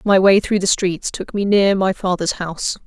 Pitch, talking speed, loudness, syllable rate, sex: 190 Hz, 230 wpm, -17 LUFS, 4.8 syllables/s, female